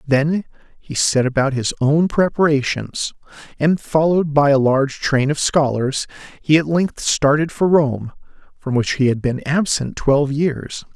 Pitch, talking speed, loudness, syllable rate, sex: 145 Hz, 160 wpm, -18 LUFS, 4.4 syllables/s, male